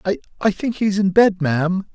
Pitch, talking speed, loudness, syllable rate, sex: 195 Hz, 185 wpm, -18 LUFS, 4.4 syllables/s, male